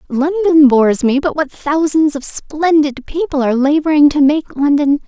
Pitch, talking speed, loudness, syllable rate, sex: 295 Hz, 165 wpm, -13 LUFS, 4.8 syllables/s, female